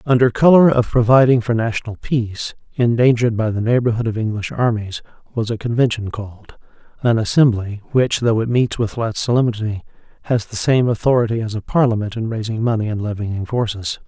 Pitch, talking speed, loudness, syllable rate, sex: 115 Hz, 170 wpm, -18 LUFS, 5.7 syllables/s, male